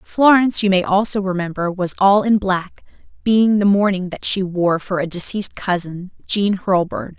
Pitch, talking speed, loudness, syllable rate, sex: 190 Hz, 175 wpm, -17 LUFS, 4.7 syllables/s, female